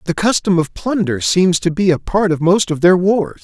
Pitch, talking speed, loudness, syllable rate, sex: 175 Hz, 245 wpm, -15 LUFS, 4.9 syllables/s, male